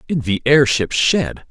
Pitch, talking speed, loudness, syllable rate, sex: 130 Hz, 160 wpm, -16 LUFS, 3.9 syllables/s, male